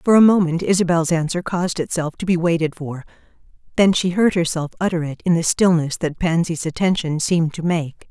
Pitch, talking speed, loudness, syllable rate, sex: 170 Hz, 195 wpm, -19 LUFS, 5.6 syllables/s, female